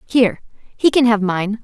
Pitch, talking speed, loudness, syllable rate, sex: 215 Hz, 145 wpm, -16 LUFS, 4.6 syllables/s, female